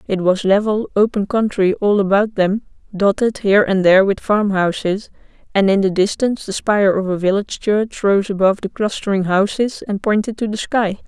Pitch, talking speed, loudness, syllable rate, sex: 200 Hz, 185 wpm, -17 LUFS, 5.4 syllables/s, female